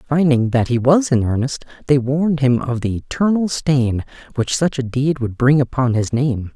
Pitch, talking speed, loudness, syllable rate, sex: 135 Hz, 200 wpm, -18 LUFS, 4.8 syllables/s, male